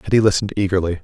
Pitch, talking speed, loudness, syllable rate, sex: 100 Hz, 175 wpm, -18 LUFS, 8.6 syllables/s, male